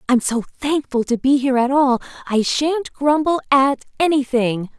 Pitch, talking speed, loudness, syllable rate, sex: 270 Hz, 165 wpm, -18 LUFS, 4.5 syllables/s, female